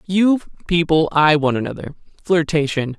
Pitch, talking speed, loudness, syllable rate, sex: 165 Hz, 120 wpm, -18 LUFS, 5.2 syllables/s, male